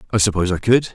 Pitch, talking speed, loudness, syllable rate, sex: 100 Hz, 255 wpm, -18 LUFS, 9.0 syllables/s, male